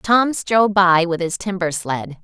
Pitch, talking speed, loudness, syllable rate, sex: 185 Hz, 190 wpm, -18 LUFS, 4.1 syllables/s, female